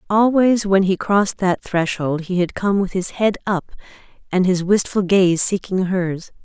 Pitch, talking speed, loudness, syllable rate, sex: 190 Hz, 175 wpm, -18 LUFS, 4.4 syllables/s, female